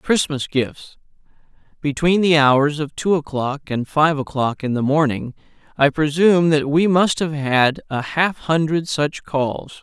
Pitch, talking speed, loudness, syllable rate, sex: 150 Hz, 160 wpm, -18 LUFS, 4.0 syllables/s, male